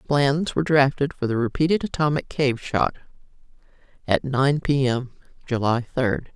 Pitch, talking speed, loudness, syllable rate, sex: 135 Hz, 140 wpm, -22 LUFS, 4.5 syllables/s, female